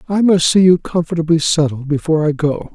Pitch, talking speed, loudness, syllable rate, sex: 160 Hz, 195 wpm, -15 LUFS, 5.8 syllables/s, male